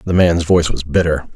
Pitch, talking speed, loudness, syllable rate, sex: 85 Hz, 220 wpm, -15 LUFS, 5.9 syllables/s, male